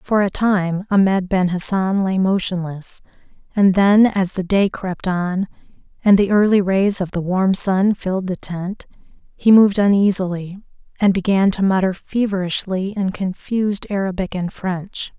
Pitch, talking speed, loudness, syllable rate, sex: 190 Hz, 155 wpm, -18 LUFS, 4.5 syllables/s, female